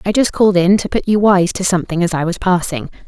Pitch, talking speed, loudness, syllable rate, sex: 185 Hz, 275 wpm, -15 LUFS, 6.3 syllables/s, female